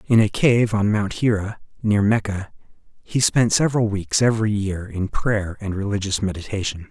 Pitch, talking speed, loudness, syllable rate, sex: 105 Hz, 165 wpm, -21 LUFS, 5.0 syllables/s, male